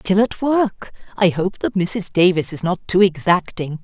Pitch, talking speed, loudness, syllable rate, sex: 185 Hz, 190 wpm, -18 LUFS, 4.3 syllables/s, female